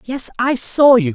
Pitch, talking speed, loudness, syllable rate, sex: 245 Hz, 210 wpm, -14 LUFS, 3.9 syllables/s, female